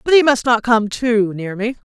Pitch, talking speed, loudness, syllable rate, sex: 230 Hz, 250 wpm, -16 LUFS, 4.7 syllables/s, female